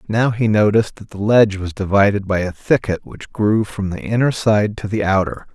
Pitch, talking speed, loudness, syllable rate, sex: 105 Hz, 215 wpm, -17 LUFS, 5.3 syllables/s, male